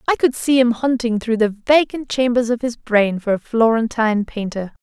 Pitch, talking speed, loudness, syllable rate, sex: 235 Hz, 200 wpm, -18 LUFS, 5.0 syllables/s, female